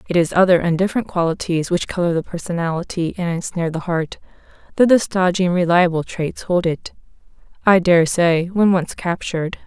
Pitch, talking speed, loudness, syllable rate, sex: 175 Hz, 175 wpm, -18 LUFS, 5.6 syllables/s, female